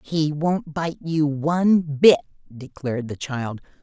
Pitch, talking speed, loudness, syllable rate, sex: 150 Hz, 140 wpm, -21 LUFS, 3.8 syllables/s, male